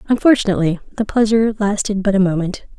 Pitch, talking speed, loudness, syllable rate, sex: 205 Hz, 150 wpm, -17 LUFS, 6.8 syllables/s, female